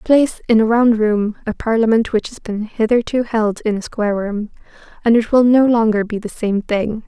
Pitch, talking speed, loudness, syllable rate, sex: 220 Hz, 210 wpm, -17 LUFS, 5.1 syllables/s, female